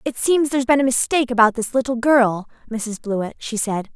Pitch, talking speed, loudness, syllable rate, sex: 240 Hz, 210 wpm, -19 LUFS, 5.6 syllables/s, female